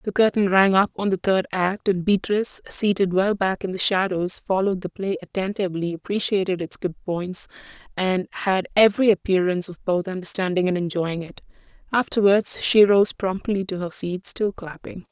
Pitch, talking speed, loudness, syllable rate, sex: 190 Hz, 170 wpm, -22 LUFS, 5.2 syllables/s, female